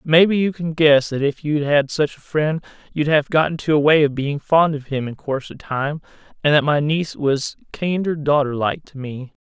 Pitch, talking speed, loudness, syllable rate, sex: 150 Hz, 230 wpm, -19 LUFS, 5.0 syllables/s, male